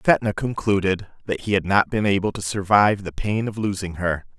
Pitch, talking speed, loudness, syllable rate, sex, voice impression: 100 Hz, 205 wpm, -22 LUFS, 5.3 syllables/s, male, masculine, adult-like, slightly thick, slightly cool, refreshing, slightly friendly